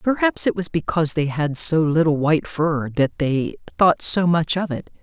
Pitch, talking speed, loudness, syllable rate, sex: 160 Hz, 205 wpm, -19 LUFS, 4.8 syllables/s, female